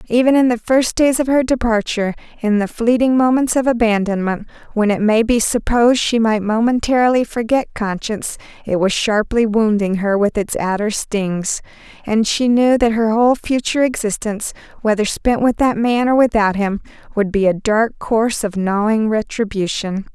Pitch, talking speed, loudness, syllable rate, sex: 225 Hz, 170 wpm, -17 LUFS, 5.1 syllables/s, female